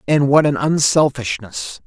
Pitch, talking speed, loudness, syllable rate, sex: 140 Hz, 130 wpm, -16 LUFS, 4.1 syllables/s, male